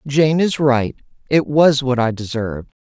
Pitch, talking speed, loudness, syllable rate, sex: 135 Hz, 170 wpm, -17 LUFS, 4.4 syllables/s, male